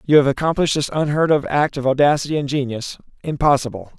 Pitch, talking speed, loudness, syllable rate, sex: 140 Hz, 165 wpm, -18 LUFS, 6.6 syllables/s, male